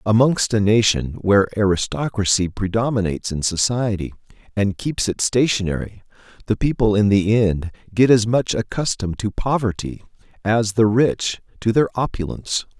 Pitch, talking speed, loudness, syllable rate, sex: 110 Hz, 135 wpm, -19 LUFS, 5.0 syllables/s, male